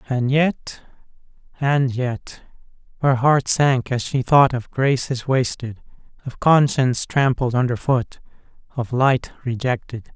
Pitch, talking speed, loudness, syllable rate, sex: 130 Hz, 120 wpm, -19 LUFS, 3.8 syllables/s, male